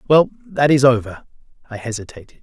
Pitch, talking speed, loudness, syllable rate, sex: 130 Hz, 150 wpm, -17 LUFS, 6.0 syllables/s, male